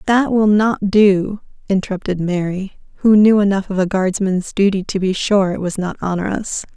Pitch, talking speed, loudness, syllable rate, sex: 195 Hz, 180 wpm, -16 LUFS, 4.9 syllables/s, female